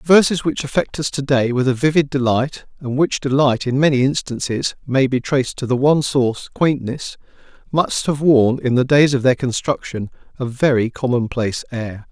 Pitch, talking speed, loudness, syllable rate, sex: 130 Hz, 185 wpm, -18 LUFS, 5.0 syllables/s, male